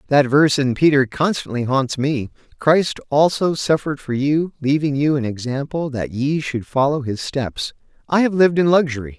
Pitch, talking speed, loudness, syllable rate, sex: 140 Hz, 175 wpm, -19 LUFS, 5.0 syllables/s, male